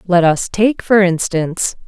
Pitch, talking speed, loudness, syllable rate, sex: 185 Hz, 160 wpm, -15 LUFS, 4.2 syllables/s, female